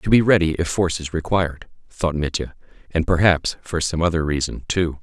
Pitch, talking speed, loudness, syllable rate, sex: 85 Hz, 190 wpm, -21 LUFS, 5.5 syllables/s, male